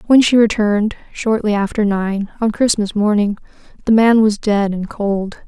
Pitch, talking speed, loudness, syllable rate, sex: 210 Hz, 165 wpm, -16 LUFS, 4.7 syllables/s, female